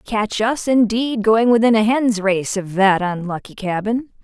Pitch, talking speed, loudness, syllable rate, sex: 215 Hz, 170 wpm, -17 LUFS, 4.2 syllables/s, female